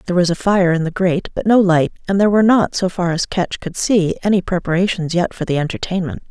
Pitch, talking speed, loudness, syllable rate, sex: 180 Hz, 245 wpm, -17 LUFS, 6.3 syllables/s, female